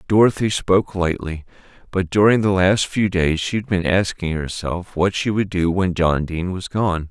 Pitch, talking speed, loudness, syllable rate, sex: 95 Hz, 195 wpm, -19 LUFS, 4.8 syllables/s, male